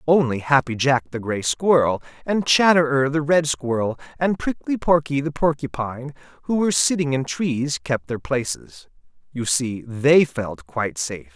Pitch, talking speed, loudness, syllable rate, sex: 135 Hz, 160 wpm, -21 LUFS, 4.7 syllables/s, male